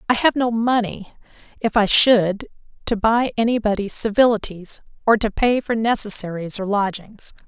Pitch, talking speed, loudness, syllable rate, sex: 215 Hz, 150 wpm, -19 LUFS, 4.8 syllables/s, female